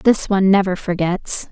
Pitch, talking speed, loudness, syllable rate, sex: 190 Hz, 160 wpm, -17 LUFS, 4.8 syllables/s, female